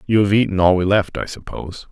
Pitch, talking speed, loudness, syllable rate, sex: 100 Hz, 250 wpm, -17 LUFS, 6.2 syllables/s, male